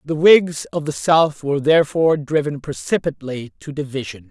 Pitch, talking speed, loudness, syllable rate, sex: 150 Hz, 155 wpm, -18 LUFS, 5.6 syllables/s, male